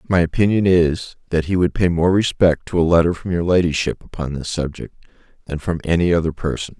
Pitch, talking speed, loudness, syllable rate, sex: 85 Hz, 205 wpm, -18 LUFS, 5.7 syllables/s, male